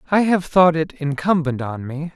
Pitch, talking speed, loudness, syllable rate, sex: 160 Hz, 195 wpm, -19 LUFS, 4.7 syllables/s, male